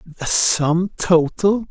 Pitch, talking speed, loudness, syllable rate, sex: 175 Hz, 105 wpm, -17 LUFS, 2.6 syllables/s, male